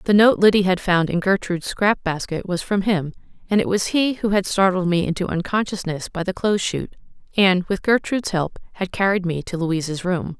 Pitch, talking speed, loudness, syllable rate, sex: 185 Hz, 210 wpm, -20 LUFS, 5.5 syllables/s, female